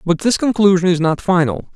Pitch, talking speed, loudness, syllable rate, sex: 180 Hz, 205 wpm, -15 LUFS, 5.6 syllables/s, male